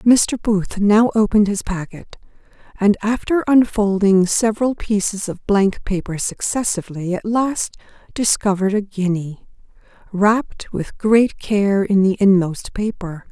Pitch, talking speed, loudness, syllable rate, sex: 205 Hz, 125 wpm, -18 LUFS, 4.2 syllables/s, female